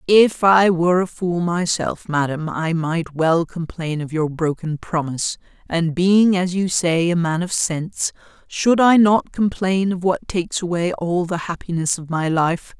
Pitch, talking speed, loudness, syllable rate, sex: 175 Hz, 180 wpm, -19 LUFS, 4.3 syllables/s, female